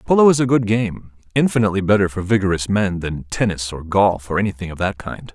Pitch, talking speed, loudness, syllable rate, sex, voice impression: 100 Hz, 215 wpm, -19 LUFS, 5.9 syllables/s, male, very masculine, very adult-like, middle-aged, thick, tensed, slightly powerful, bright, very soft, clear, very fluent, very cool, very intellectual, slightly refreshing, very sincere, very calm, mature, very friendly, very reassuring, elegant, slightly sweet, very kind